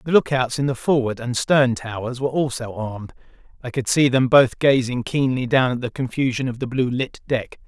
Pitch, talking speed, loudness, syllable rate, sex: 125 Hz, 210 wpm, -20 LUFS, 5.4 syllables/s, male